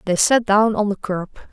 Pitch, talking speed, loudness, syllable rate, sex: 205 Hz, 235 wpm, -18 LUFS, 5.0 syllables/s, female